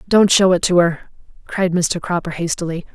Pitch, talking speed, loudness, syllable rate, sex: 175 Hz, 185 wpm, -17 LUFS, 5.0 syllables/s, female